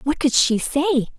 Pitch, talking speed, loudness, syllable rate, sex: 280 Hz, 205 wpm, -19 LUFS, 5.3 syllables/s, female